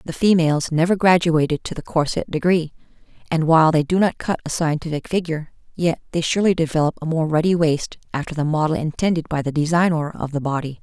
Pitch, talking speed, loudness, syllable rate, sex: 160 Hz, 195 wpm, -20 LUFS, 6.2 syllables/s, female